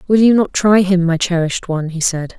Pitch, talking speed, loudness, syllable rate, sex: 180 Hz, 250 wpm, -15 LUFS, 5.9 syllables/s, female